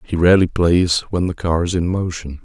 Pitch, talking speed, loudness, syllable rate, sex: 85 Hz, 220 wpm, -17 LUFS, 5.4 syllables/s, male